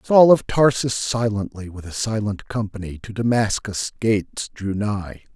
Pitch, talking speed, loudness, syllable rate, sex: 110 Hz, 145 wpm, -21 LUFS, 4.4 syllables/s, male